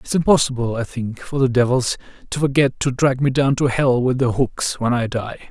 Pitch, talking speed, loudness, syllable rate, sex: 125 Hz, 230 wpm, -19 LUFS, 5.1 syllables/s, male